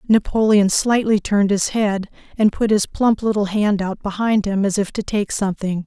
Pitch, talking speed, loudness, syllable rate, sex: 205 Hz, 195 wpm, -18 LUFS, 5.0 syllables/s, female